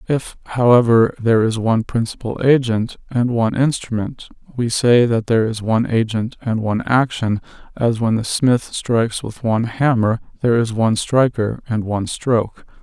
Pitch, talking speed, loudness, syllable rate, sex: 115 Hz, 165 wpm, -18 LUFS, 5.2 syllables/s, male